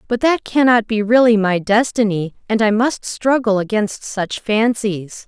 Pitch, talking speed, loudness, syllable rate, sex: 220 Hz, 160 wpm, -16 LUFS, 4.2 syllables/s, female